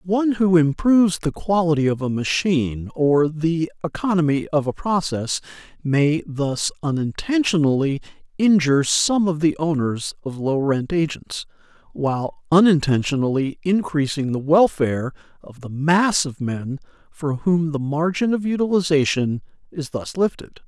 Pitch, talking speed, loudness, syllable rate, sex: 155 Hz, 130 wpm, -20 LUFS, 4.6 syllables/s, male